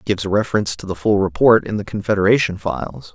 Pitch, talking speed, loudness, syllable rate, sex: 95 Hz, 190 wpm, -18 LUFS, 6.6 syllables/s, male